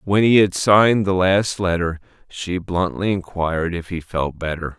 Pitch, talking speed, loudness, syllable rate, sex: 90 Hz, 175 wpm, -19 LUFS, 4.5 syllables/s, male